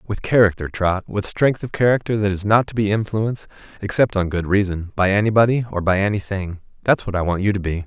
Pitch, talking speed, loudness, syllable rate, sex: 100 Hz, 215 wpm, -19 LUFS, 5.9 syllables/s, male